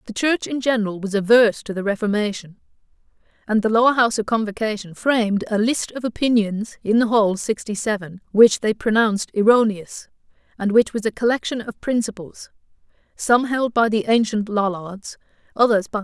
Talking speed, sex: 200 wpm, female